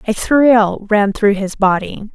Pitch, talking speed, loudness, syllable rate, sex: 210 Hz, 170 wpm, -14 LUFS, 3.5 syllables/s, female